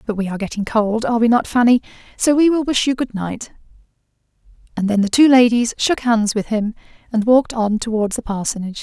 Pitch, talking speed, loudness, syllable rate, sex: 230 Hz, 195 wpm, -17 LUFS, 6.1 syllables/s, female